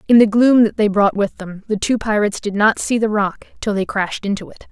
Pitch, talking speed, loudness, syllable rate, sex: 210 Hz, 265 wpm, -17 LUFS, 5.8 syllables/s, female